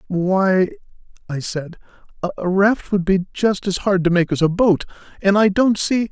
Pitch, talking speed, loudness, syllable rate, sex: 190 Hz, 185 wpm, -18 LUFS, 4.6 syllables/s, male